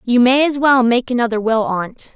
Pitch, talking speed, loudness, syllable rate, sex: 240 Hz, 225 wpm, -15 LUFS, 4.9 syllables/s, female